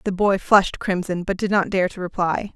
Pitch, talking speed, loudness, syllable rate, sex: 190 Hz, 235 wpm, -21 LUFS, 5.4 syllables/s, female